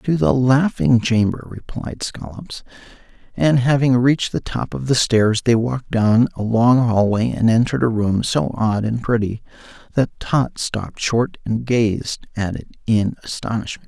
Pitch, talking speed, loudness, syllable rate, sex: 115 Hz, 165 wpm, -18 LUFS, 4.4 syllables/s, male